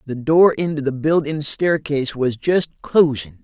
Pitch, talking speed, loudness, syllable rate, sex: 145 Hz, 155 wpm, -18 LUFS, 4.5 syllables/s, male